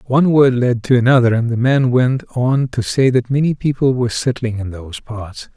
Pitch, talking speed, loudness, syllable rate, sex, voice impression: 120 Hz, 215 wpm, -15 LUFS, 5.2 syllables/s, male, masculine, middle-aged, relaxed, slightly weak, soft, slightly raspy, sincere, calm, mature, friendly, reassuring, wild, kind, slightly modest